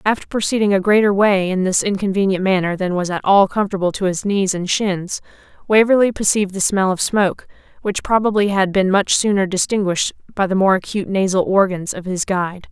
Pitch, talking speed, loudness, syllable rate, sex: 195 Hz, 195 wpm, -17 LUFS, 5.9 syllables/s, female